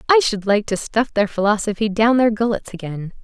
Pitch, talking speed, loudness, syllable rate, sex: 215 Hz, 205 wpm, -19 LUFS, 5.4 syllables/s, female